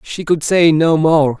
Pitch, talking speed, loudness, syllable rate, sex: 160 Hz, 215 wpm, -13 LUFS, 3.9 syllables/s, male